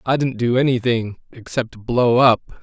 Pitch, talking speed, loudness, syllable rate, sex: 120 Hz, 135 wpm, -18 LUFS, 4.5 syllables/s, male